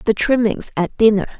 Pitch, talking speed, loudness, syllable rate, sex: 210 Hz, 175 wpm, -17 LUFS, 5.0 syllables/s, female